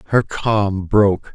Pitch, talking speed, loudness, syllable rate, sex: 100 Hz, 135 wpm, -17 LUFS, 3.7 syllables/s, male